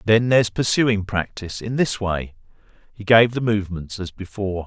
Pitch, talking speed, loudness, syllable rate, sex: 105 Hz, 165 wpm, -21 LUFS, 5.3 syllables/s, male